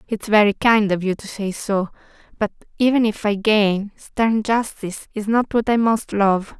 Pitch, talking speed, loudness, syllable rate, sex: 210 Hz, 190 wpm, -19 LUFS, 4.5 syllables/s, female